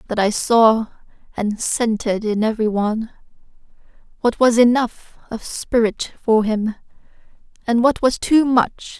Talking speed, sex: 135 wpm, female